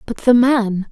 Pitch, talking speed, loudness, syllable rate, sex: 230 Hz, 195 wpm, -15 LUFS, 4.0 syllables/s, female